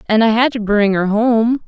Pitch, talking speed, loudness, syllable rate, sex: 220 Hz, 250 wpm, -14 LUFS, 4.8 syllables/s, female